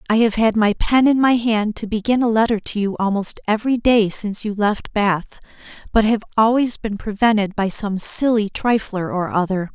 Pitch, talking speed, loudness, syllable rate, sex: 215 Hz, 195 wpm, -18 LUFS, 5.1 syllables/s, female